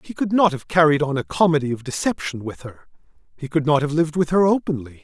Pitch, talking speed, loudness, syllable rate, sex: 155 Hz, 240 wpm, -20 LUFS, 6.3 syllables/s, male